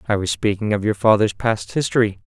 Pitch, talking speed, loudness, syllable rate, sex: 105 Hz, 210 wpm, -19 LUFS, 5.9 syllables/s, male